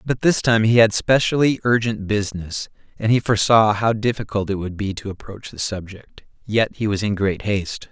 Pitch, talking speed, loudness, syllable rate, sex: 105 Hz, 195 wpm, -19 LUFS, 5.2 syllables/s, male